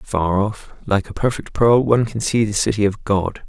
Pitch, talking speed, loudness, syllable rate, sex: 105 Hz, 225 wpm, -19 LUFS, 4.8 syllables/s, male